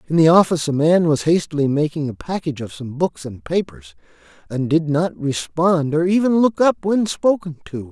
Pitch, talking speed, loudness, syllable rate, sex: 160 Hz, 195 wpm, -18 LUFS, 5.2 syllables/s, male